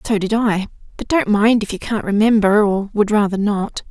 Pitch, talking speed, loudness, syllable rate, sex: 210 Hz, 215 wpm, -17 LUFS, 5.0 syllables/s, female